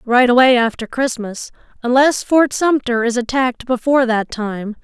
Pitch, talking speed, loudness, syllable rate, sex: 245 Hz, 150 wpm, -16 LUFS, 4.8 syllables/s, female